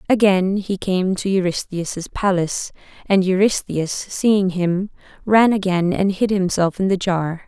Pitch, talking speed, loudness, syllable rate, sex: 190 Hz, 145 wpm, -19 LUFS, 4.1 syllables/s, female